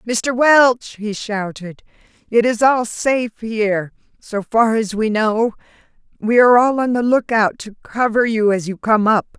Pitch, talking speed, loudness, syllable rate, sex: 225 Hz, 175 wpm, -16 LUFS, 4.3 syllables/s, female